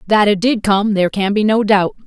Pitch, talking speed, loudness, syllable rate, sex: 205 Hz, 260 wpm, -15 LUFS, 5.5 syllables/s, female